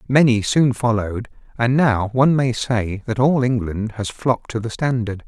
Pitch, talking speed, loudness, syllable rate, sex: 120 Hz, 180 wpm, -19 LUFS, 4.8 syllables/s, male